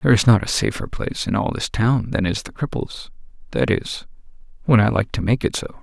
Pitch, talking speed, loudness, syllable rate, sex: 110 Hz, 235 wpm, -20 LUFS, 5.7 syllables/s, male